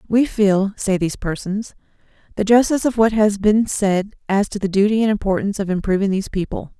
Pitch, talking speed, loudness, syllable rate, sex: 205 Hz, 195 wpm, -18 LUFS, 5.9 syllables/s, female